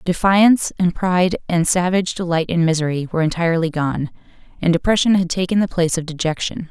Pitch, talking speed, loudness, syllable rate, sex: 175 Hz, 170 wpm, -18 LUFS, 6.3 syllables/s, female